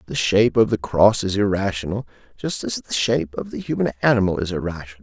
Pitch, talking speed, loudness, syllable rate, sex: 100 Hz, 205 wpm, -21 LUFS, 6.1 syllables/s, male